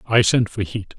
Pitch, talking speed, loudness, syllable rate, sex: 105 Hz, 245 wpm, -20 LUFS, 4.7 syllables/s, male